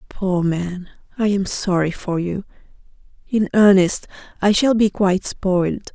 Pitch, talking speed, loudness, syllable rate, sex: 190 Hz, 140 wpm, -19 LUFS, 4.4 syllables/s, female